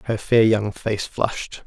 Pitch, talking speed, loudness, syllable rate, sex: 105 Hz, 180 wpm, -21 LUFS, 4.0 syllables/s, male